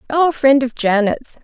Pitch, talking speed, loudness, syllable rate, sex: 260 Hz, 170 wpm, -15 LUFS, 4.2 syllables/s, female